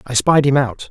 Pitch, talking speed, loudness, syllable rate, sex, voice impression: 135 Hz, 265 wpm, -15 LUFS, 5.1 syllables/s, male, masculine, adult-like, slightly muffled, sincere, slightly calm, reassuring, slightly kind